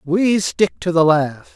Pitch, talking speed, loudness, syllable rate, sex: 175 Hz, 190 wpm, -17 LUFS, 3.6 syllables/s, male